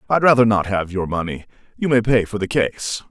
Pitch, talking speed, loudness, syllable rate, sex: 105 Hz, 230 wpm, -19 LUFS, 5.5 syllables/s, male